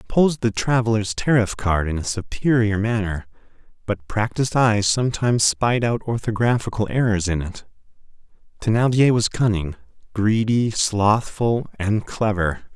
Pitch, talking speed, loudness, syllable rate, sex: 110 Hz, 125 wpm, -20 LUFS, 4.9 syllables/s, male